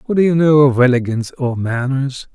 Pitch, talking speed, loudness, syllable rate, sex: 135 Hz, 205 wpm, -15 LUFS, 5.6 syllables/s, male